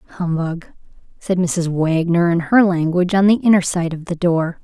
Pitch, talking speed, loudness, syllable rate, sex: 175 Hz, 180 wpm, -17 LUFS, 4.6 syllables/s, female